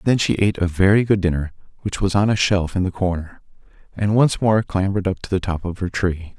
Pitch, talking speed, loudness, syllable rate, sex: 95 Hz, 245 wpm, -20 LUFS, 5.9 syllables/s, male